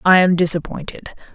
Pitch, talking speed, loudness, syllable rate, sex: 175 Hz, 135 wpm, -15 LUFS, 5.9 syllables/s, female